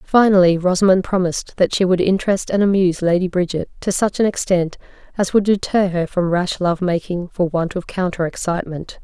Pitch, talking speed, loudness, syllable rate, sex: 180 Hz, 185 wpm, -18 LUFS, 5.6 syllables/s, female